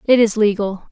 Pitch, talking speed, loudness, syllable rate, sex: 215 Hz, 195 wpm, -16 LUFS, 5.3 syllables/s, female